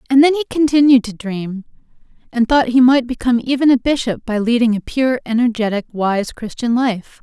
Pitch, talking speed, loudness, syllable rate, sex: 240 Hz, 185 wpm, -16 LUFS, 5.3 syllables/s, female